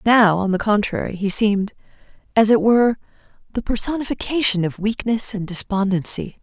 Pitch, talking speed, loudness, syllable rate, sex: 210 Hz, 140 wpm, -19 LUFS, 5.5 syllables/s, female